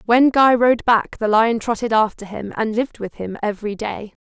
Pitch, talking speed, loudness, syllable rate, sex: 225 Hz, 215 wpm, -18 LUFS, 5.1 syllables/s, female